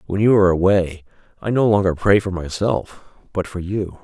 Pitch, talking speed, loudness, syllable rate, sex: 95 Hz, 195 wpm, -19 LUFS, 5.1 syllables/s, male